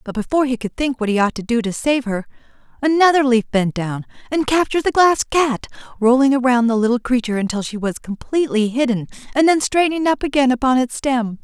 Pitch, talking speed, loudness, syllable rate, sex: 250 Hz, 210 wpm, -18 LUFS, 6.0 syllables/s, female